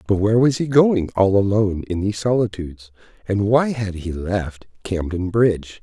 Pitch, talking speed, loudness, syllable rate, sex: 100 Hz, 175 wpm, -19 LUFS, 5.1 syllables/s, male